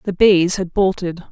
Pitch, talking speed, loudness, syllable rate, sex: 185 Hz, 185 wpm, -16 LUFS, 4.4 syllables/s, female